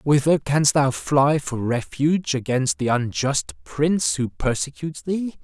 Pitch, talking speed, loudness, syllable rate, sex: 140 Hz, 145 wpm, -21 LUFS, 4.2 syllables/s, male